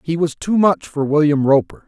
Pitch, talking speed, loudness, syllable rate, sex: 155 Hz, 225 wpm, -16 LUFS, 5.2 syllables/s, male